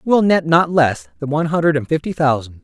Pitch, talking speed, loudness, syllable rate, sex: 150 Hz, 230 wpm, -16 LUFS, 5.8 syllables/s, male